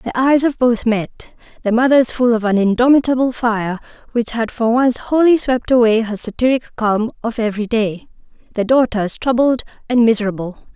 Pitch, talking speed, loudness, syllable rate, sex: 235 Hz, 160 wpm, -16 LUFS, 5.1 syllables/s, female